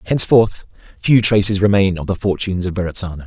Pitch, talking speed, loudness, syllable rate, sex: 95 Hz, 165 wpm, -16 LUFS, 6.5 syllables/s, male